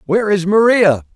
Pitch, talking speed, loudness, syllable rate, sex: 190 Hz, 155 wpm, -13 LUFS, 5.5 syllables/s, male